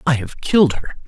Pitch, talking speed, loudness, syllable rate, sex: 135 Hz, 225 wpm, -17 LUFS, 6.1 syllables/s, male